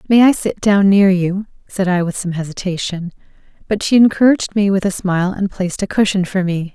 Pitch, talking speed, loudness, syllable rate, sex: 190 Hz, 215 wpm, -16 LUFS, 5.7 syllables/s, female